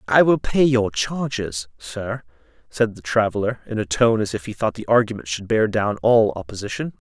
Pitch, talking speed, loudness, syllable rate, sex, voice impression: 110 Hz, 195 wpm, -21 LUFS, 5.1 syllables/s, male, very masculine, slightly young, slightly thick, very tensed, very powerful, very bright, slightly soft, very clear, very fluent, cool, slightly intellectual, very refreshing, very sincere, slightly calm, very friendly, very reassuring, very unique, wild, slightly sweet, very lively, kind, slightly intense, light